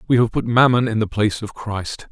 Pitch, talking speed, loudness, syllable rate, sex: 110 Hz, 255 wpm, -19 LUFS, 5.7 syllables/s, male